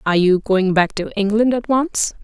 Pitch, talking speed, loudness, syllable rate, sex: 210 Hz, 215 wpm, -17 LUFS, 5.0 syllables/s, female